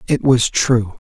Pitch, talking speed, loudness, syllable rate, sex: 120 Hz, 170 wpm, -16 LUFS, 3.6 syllables/s, male